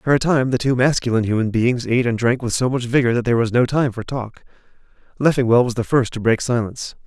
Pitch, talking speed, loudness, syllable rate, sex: 120 Hz, 245 wpm, -18 LUFS, 6.5 syllables/s, male